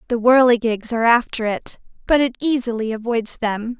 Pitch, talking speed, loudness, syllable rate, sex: 235 Hz, 160 wpm, -18 LUFS, 5.3 syllables/s, female